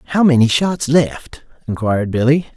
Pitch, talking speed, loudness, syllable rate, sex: 135 Hz, 140 wpm, -15 LUFS, 5.0 syllables/s, male